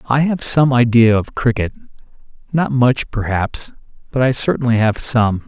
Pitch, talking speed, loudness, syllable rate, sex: 120 Hz, 145 wpm, -16 LUFS, 4.5 syllables/s, male